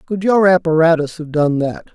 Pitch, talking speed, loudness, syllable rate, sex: 165 Hz, 185 wpm, -15 LUFS, 5.1 syllables/s, male